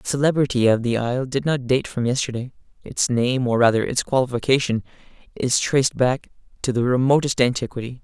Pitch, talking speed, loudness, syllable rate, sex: 125 Hz, 170 wpm, -21 LUFS, 5.8 syllables/s, male